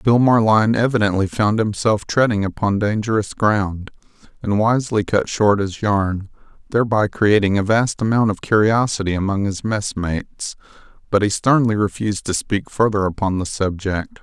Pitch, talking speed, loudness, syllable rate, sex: 105 Hz, 150 wpm, -18 LUFS, 5.0 syllables/s, male